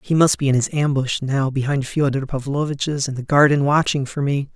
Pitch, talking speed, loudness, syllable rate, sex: 140 Hz, 210 wpm, -19 LUFS, 5.2 syllables/s, male